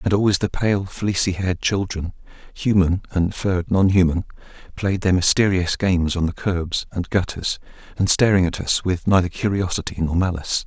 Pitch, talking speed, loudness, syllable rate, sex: 95 Hz, 165 wpm, -20 LUFS, 5.2 syllables/s, male